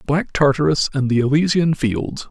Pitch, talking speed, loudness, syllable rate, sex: 140 Hz, 155 wpm, -18 LUFS, 4.7 syllables/s, male